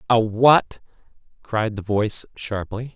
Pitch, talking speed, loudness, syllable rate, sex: 110 Hz, 120 wpm, -21 LUFS, 3.9 syllables/s, male